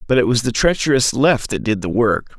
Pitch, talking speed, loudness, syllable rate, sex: 120 Hz, 250 wpm, -17 LUFS, 5.5 syllables/s, male